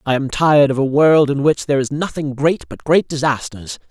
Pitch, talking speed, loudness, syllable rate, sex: 140 Hz, 230 wpm, -16 LUFS, 5.4 syllables/s, male